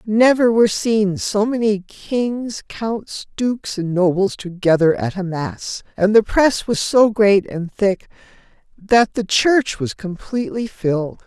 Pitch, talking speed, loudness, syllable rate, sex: 210 Hz, 150 wpm, -18 LUFS, 3.9 syllables/s, female